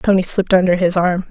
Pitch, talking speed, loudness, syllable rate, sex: 185 Hz, 230 wpm, -15 LUFS, 6.3 syllables/s, female